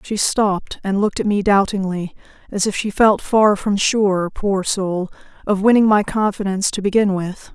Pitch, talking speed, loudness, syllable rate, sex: 200 Hz, 185 wpm, -18 LUFS, 4.8 syllables/s, female